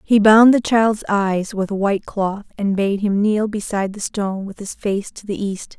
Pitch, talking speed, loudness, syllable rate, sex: 205 Hz, 230 wpm, -18 LUFS, 4.7 syllables/s, female